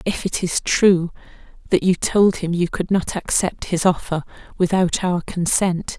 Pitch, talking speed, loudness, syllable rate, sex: 180 Hz, 170 wpm, -19 LUFS, 4.2 syllables/s, female